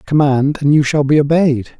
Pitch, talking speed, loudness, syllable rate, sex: 145 Hz, 200 wpm, -13 LUFS, 5.2 syllables/s, male